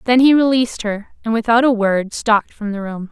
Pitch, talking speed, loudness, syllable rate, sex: 225 Hz, 230 wpm, -16 LUFS, 5.7 syllables/s, female